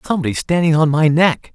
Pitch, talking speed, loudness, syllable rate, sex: 160 Hz, 195 wpm, -15 LUFS, 6.2 syllables/s, male